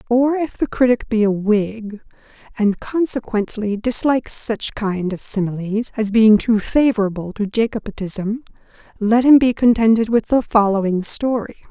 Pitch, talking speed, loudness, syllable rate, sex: 220 Hz, 145 wpm, -18 LUFS, 4.6 syllables/s, female